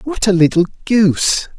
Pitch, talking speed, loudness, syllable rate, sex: 175 Hz, 150 wpm, -14 LUFS, 4.9 syllables/s, male